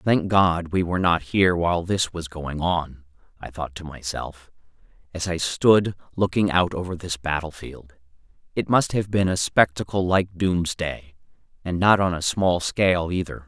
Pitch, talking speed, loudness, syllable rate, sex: 90 Hz, 170 wpm, -22 LUFS, 4.6 syllables/s, male